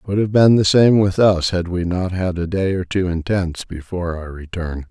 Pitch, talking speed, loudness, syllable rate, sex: 90 Hz, 255 wpm, -18 LUFS, 5.0 syllables/s, male